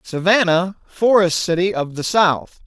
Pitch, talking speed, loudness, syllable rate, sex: 180 Hz, 135 wpm, -17 LUFS, 4.1 syllables/s, male